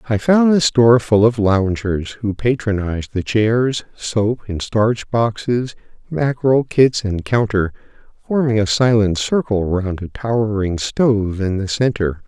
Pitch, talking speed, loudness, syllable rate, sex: 110 Hz, 145 wpm, -17 LUFS, 4.2 syllables/s, male